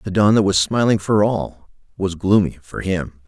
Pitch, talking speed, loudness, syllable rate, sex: 95 Hz, 200 wpm, -18 LUFS, 4.6 syllables/s, male